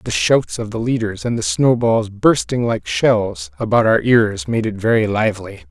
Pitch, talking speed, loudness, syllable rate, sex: 115 Hz, 190 wpm, -17 LUFS, 4.5 syllables/s, male